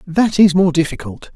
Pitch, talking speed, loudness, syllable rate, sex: 175 Hz, 175 wpm, -14 LUFS, 5.0 syllables/s, male